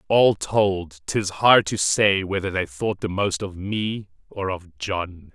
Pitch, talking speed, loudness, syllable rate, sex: 95 Hz, 180 wpm, -22 LUFS, 3.5 syllables/s, male